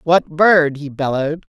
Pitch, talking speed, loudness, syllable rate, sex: 155 Hz, 155 wpm, -16 LUFS, 4.3 syllables/s, female